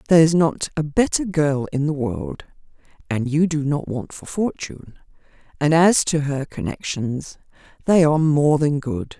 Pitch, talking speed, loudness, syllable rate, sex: 150 Hz, 170 wpm, -20 LUFS, 4.6 syllables/s, female